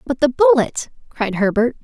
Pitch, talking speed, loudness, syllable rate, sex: 215 Hz, 165 wpm, -17 LUFS, 4.7 syllables/s, female